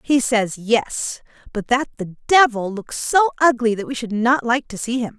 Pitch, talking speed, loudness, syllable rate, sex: 235 Hz, 210 wpm, -19 LUFS, 4.4 syllables/s, female